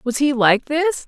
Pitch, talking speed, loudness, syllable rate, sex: 275 Hz, 225 wpm, -17 LUFS, 3.9 syllables/s, female